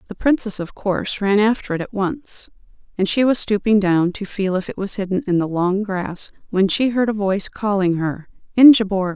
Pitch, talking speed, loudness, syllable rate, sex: 200 Hz, 210 wpm, -19 LUFS, 5.1 syllables/s, female